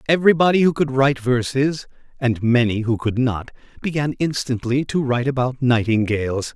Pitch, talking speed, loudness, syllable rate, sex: 130 Hz, 145 wpm, -19 LUFS, 5.0 syllables/s, male